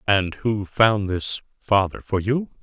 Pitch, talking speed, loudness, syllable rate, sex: 105 Hz, 160 wpm, -22 LUFS, 3.5 syllables/s, male